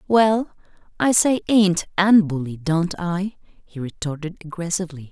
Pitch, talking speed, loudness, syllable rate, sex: 180 Hz, 130 wpm, -20 LUFS, 4.4 syllables/s, female